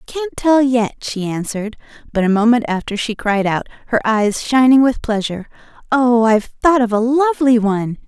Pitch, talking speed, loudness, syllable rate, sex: 235 Hz, 185 wpm, -16 LUFS, 5.5 syllables/s, female